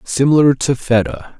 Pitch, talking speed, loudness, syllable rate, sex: 125 Hz, 130 wpm, -14 LUFS, 4.7 syllables/s, male